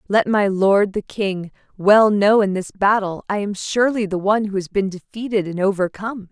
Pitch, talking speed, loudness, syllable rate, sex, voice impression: 200 Hz, 200 wpm, -19 LUFS, 5.1 syllables/s, female, feminine, adult-like, tensed, powerful, bright, clear, intellectual, slightly calm, elegant, lively, sharp